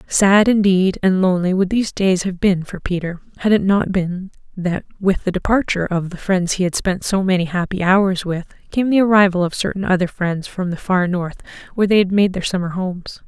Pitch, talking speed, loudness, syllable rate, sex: 185 Hz, 215 wpm, -18 LUFS, 5.5 syllables/s, female